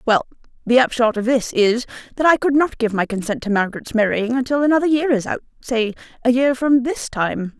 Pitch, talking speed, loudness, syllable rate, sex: 240 Hz, 205 wpm, -19 LUFS, 5.6 syllables/s, female